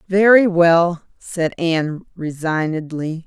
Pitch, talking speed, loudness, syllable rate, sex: 170 Hz, 90 wpm, -17 LUFS, 3.6 syllables/s, female